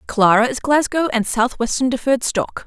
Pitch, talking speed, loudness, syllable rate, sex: 250 Hz, 160 wpm, -18 LUFS, 5.1 syllables/s, female